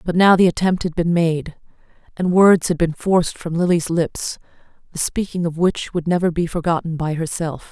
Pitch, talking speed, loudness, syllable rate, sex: 170 Hz, 195 wpm, -19 LUFS, 5.1 syllables/s, female